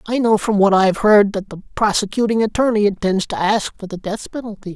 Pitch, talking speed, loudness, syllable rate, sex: 205 Hz, 225 wpm, -17 LUFS, 5.9 syllables/s, male